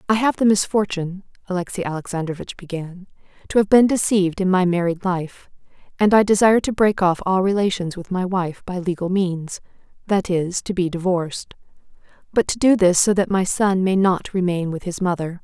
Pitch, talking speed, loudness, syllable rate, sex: 185 Hz, 185 wpm, -20 LUFS, 5.4 syllables/s, female